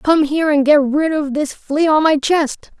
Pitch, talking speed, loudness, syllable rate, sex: 300 Hz, 235 wpm, -15 LUFS, 4.4 syllables/s, female